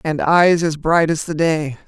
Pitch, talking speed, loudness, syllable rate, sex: 160 Hz, 225 wpm, -16 LUFS, 4.1 syllables/s, female